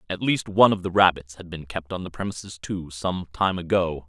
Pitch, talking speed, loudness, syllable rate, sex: 90 Hz, 235 wpm, -23 LUFS, 5.5 syllables/s, male